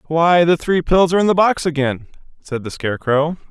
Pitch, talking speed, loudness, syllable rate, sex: 160 Hz, 205 wpm, -16 LUFS, 5.5 syllables/s, male